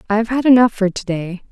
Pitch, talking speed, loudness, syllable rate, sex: 215 Hz, 240 wpm, -16 LUFS, 6.3 syllables/s, female